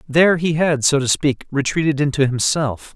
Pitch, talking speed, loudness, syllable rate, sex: 145 Hz, 185 wpm, -18 LUFS, 5.1 syllables/s, male